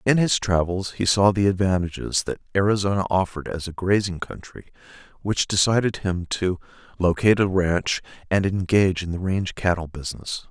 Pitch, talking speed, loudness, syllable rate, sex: 95 Hz, 160 wpm, -22 LUFS, 5.5 syllables/s, male